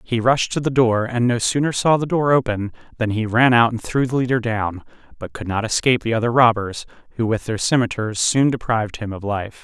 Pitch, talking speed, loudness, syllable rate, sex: 115 Hz, 230 wpm, -19 LUFS, 5.6 syllables/s, male